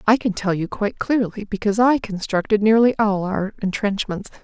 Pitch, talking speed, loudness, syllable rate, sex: 210 Hz, 175 wpm, -20 LUFS, 5.3 syllables/s, female